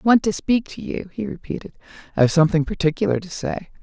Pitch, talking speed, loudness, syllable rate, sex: 190 Hz, 205 wpm, -21 LUFS, 6.6 syllables/s, female